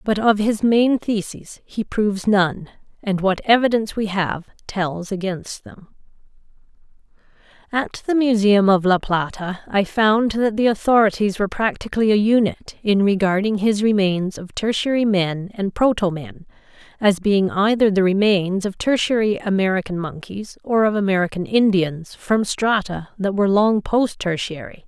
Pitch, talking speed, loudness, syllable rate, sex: 205 Hz, 145 wpm, -19 LUFS, 4.6 syllables/s, female